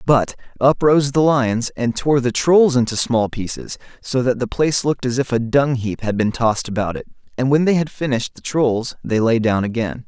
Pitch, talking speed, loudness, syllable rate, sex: 125 Hz, 225 wpm, -18 LUFS, 5.2 syllables/s, male